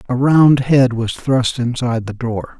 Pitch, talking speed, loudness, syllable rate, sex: 125 Hz, 185 wpm, -15 LUFS, 4.2 syllables/s, male